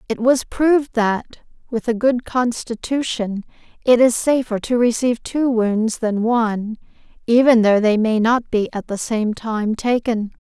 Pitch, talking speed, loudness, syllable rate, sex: 230 Hz, 160 wpm, -18 LUFS, 4.3 syllables/s, female